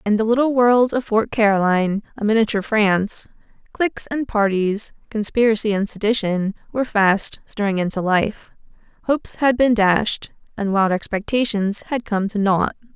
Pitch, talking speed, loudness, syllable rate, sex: 215 Hz, 150 wpm, -19 LUFS, 5.0 syllables/s, female